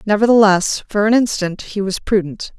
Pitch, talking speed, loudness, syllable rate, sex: 205 Hz, 165 wpm, -16 LUFS, 5.0 syllables/s, female